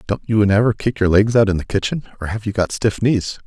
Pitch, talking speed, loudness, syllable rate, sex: 105 Hz, 275 wpm, -18 LUFS, 5.7 syllables/s, male